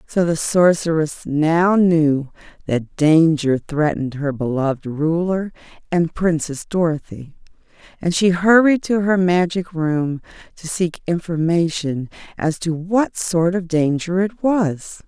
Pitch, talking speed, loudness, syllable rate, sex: 165 Hz, 125 wpm, -18 LUFS, 3.9 syllables/s, female